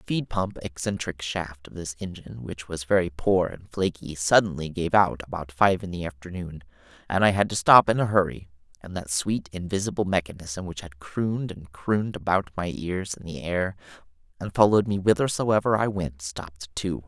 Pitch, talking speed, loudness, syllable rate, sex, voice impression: 90 Hz, 190 wpm, -25 LUFS, 5.2 syllables/s, male, masculine, slightly middle-aged, slightly muffled, very calm, slightly mature, reassuring, slightly modest